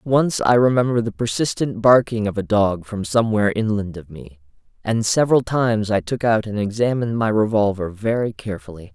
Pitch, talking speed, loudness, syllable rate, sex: 110 Hz, 175 wpm, -19 LUFS, 5.6 syllables/s, male